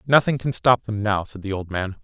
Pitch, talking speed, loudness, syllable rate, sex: 110 Hz, 265 wpm, -22 LUFS, 5.2 syllables/s, male